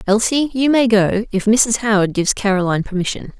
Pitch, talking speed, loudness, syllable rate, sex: 215 Hz, 175 wpm, -16 LUFS, 5.7 syllables/s, female